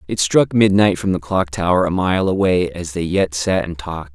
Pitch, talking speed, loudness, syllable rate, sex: 90 Hz, 230 wpm, -17 LUFS, 5.1 syllables/s, male